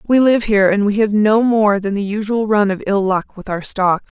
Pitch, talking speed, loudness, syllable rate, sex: 205 Hz, 260 wpm, -16 LUFS, 5.2 syllables/s, female